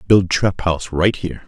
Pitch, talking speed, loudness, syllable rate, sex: 90 Hz, 205 wpm, -18 LUFS, 5.3 syllables/s, male